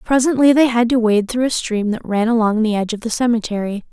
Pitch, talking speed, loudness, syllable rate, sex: 230 Hz, 245 wpm, -17 LUFS, 6.1 syllables/s, female